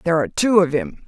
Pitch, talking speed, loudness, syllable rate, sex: 175 Hz, 280 wpm, -18 LUFS, 8.3 syllables/s, female